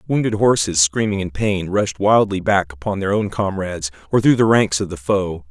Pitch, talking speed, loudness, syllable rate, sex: 100 Hz, 205 wpm, -18 LUFS, 5.1 syllables/s, male